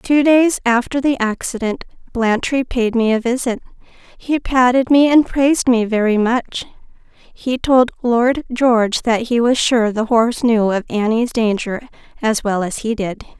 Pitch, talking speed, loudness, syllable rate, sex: 240 Hz, 165 wpm, -16 LUFS, 4.4 syllables/s, female